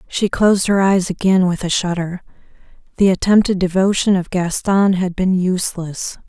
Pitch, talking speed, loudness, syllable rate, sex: 185 Hz, 155 wpm, -16 LUFS, 4.9 syllables/s, female